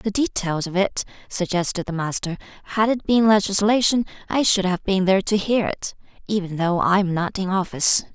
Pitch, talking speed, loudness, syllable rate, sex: 195 Hz, 190 wpm, -21 LUFS, 5.4 syllables/s, female